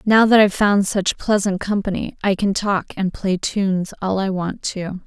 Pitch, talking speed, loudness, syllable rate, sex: 195 Hz, 200 wpm, -19 LUFS, 4.7 syllables/s, female